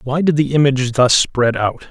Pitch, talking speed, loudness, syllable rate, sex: 135 Hz, 220 wpm, -15 LUFS, 5.0 syllables/s, male